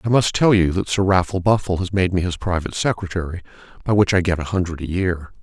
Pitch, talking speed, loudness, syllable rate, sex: 90 Hz, 245 wpm, -20 LUFS, 6.2 syllables/s, male